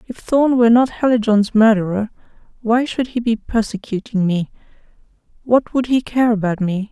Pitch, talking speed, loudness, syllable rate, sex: 225 Hz, 145 wpm, -17 LUFS, 5.1 syllables/s, female